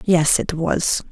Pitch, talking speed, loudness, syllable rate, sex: 170 Hz, 160 wpm, -19 LUFS, 3.1 syllables/s, female